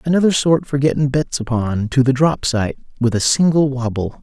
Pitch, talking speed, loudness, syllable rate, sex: 135 Hz, 200 wpm, -17 LUFS, 5.1 syllables/s, male